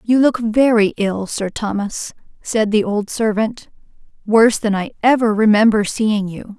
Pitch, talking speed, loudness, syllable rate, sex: 215 Hz, 155 wpm, -17 LUFS, 4.3 syllables/s, female